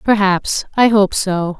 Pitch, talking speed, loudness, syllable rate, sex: 200 Hz, 150 wpm, -15 LUFS, 3.5 syllables/s, female